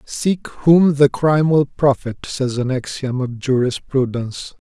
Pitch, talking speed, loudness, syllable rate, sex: 135 Hz, 140 wpm, -18 LUFS, 4.3 syllables/s, male